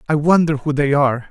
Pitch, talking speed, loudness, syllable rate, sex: 145 Hz, 230 wpm, -16 LUFS, 6.2 syllables/s, male